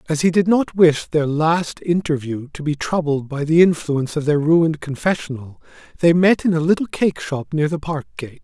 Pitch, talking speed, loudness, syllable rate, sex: 155 Hz, 190 wpm, -18 LUFS, 5.3 syllables/s, male